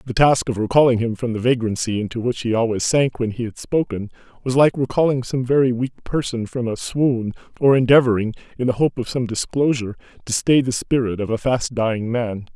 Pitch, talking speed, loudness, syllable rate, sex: 120 Hz, 210 wpm, -20 LUFS, 5.6 syllables/s, male